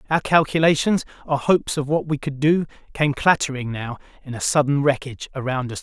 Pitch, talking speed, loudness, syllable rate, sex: 140 Hz, 185 wpm, -21 LUFS, 5.8 syllables/s, male